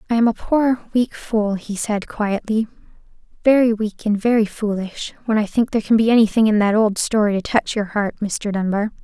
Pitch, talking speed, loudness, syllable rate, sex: 215 Hz, 205 wpm, -19 LUFS, 5.3 syllables/s, female